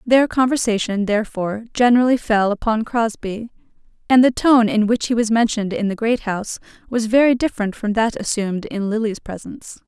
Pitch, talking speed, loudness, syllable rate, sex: 225 Hz, 170 wpm, -18 LUFS, 5.7 syllables/s, female